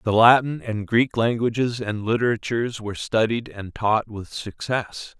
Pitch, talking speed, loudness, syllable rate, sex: 110 Hz, 150 wpm, -22 LUFS, 4.5 syllables/s, male